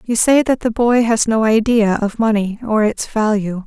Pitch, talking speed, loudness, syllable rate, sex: 220 Hz, 215 wpm, -15 LUFS, 4.6 syllables/s, female